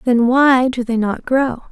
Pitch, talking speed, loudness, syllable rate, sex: 250 Hz, 210 wpm, -15 LUFS, 3.9 syllables/s, female